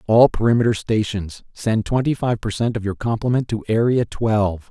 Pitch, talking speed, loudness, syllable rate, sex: 110 Hz, 180 wpm, -20 LUFS, 5.2 syllables/s, male